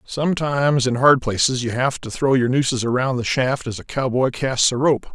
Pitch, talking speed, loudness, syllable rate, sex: 130 Hz, 220 wpm, -19 LUFS, 5.2 syllables/s, male